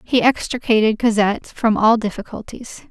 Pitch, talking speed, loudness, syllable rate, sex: 220 Hz, 125 wpm, -17 LUFS, 5.1 syllables/s, female